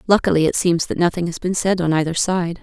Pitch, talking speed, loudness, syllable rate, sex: 175 Hz, 250 wpm, -19 LUFS, 6.1 syllables/s, female